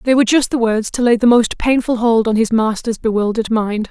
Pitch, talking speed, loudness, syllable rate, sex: 230 Hz, 245 wpm, -15 LUFS, 5.7 syllables/s, female